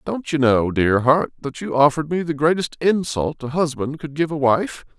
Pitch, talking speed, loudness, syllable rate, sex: 145 Hz, 215 wpm, -20 LUFS, 4.9 syllables/s, male